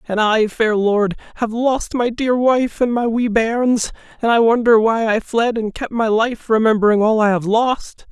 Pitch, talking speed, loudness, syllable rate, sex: 225 Hz, 205 wpm, -17 LUFS, 4.3 syllables/s, male